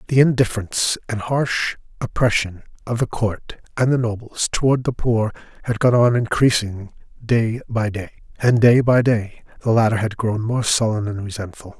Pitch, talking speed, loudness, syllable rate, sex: 115 Hz, 170 wpm, -19 LUFS, 4.8 syllables/s, male